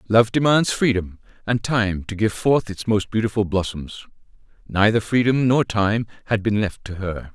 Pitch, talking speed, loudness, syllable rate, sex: 110 Hz, 170 wpm, -21 LUFS, 4.6 syllables/s, male